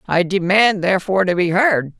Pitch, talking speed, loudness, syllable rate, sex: 190 Hz, 180 wpm, -16 LUFS, 5.5 syllables/s, male